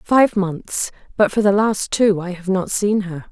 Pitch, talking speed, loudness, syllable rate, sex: 195 Hz, 220 wpm, -19 LUFS, 4.0 syllables/s, female